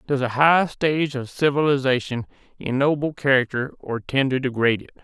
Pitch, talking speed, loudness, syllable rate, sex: 135 Hz, 155 wpm, -21 LUFS, 5.5 syllables/s, male